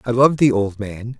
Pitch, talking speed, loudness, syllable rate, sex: 115 Hz, 250 wpm, -17 LUFS, 5.5 syllables/s, male